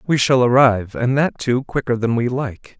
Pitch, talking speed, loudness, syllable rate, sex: 125 Hz, 215 wpm, -17 LUFS, 5.1 syllables/s, male